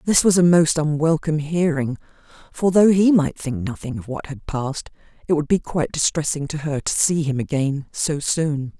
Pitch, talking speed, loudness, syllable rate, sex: 155 Hz, 200 wpm, -20 LUFS, 5.1 syllables/s, female